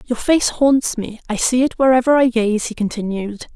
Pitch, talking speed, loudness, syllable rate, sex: 235 Hz, 205 wpm, -17 LUFS, 4.9 syllables/s, female